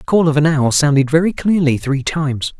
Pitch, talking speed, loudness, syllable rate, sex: 150 Hz, 230 wpm, -15 LUFS, 5.5 syllables/s, male